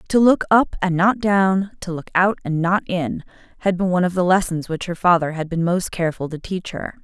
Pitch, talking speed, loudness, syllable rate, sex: 180 Hz, 240 wpm, -20 LUFS, 5.4 syllables/s, female